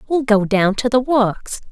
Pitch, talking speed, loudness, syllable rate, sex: 230 Hz, 210 wpm, -16 LUFS, 4.1 syllables/s, female